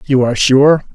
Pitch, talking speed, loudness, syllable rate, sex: 135 Hz, 190 wpm, -11 LUFS, 5.1 syllables/s, male